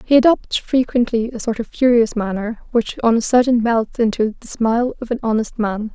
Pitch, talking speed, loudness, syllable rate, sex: 230 Hz, 200 wpm, -18 LUFS, 5.2 syllables/s, female